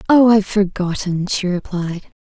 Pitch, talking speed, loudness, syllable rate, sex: 195 Hz, 135 wpm, -17 LUFS, 4.7 syllables/s, female